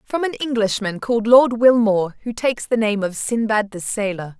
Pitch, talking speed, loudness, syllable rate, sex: 220 Hz, 190 wpm, -19 LUFS, 5.3 syllables/s, female